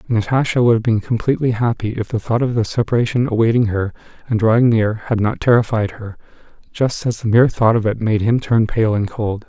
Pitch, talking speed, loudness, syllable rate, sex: 115 Hz, 215 wpm, -17 LUFS, 5.8 syllables/s, male